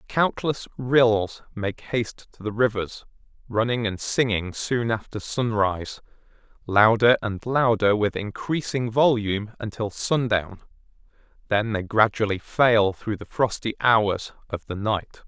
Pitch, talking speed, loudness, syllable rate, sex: 110 Hz, 125 wpm, -23 LUFS, 4.1 syllables/s, male